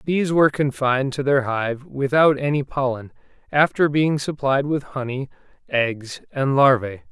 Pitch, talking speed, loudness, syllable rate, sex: 135 Hz, 145 wpm, -20 LUFS, 4.5 syllables/s, male